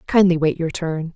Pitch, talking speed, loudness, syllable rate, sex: 170 Hz, 210 wpm, -19 LUFS, 5.0 syllables/s, female